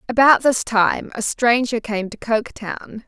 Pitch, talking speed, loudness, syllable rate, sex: 230 Hz, 155 wpm, -19 LUFS, 4.2 syllables/s, female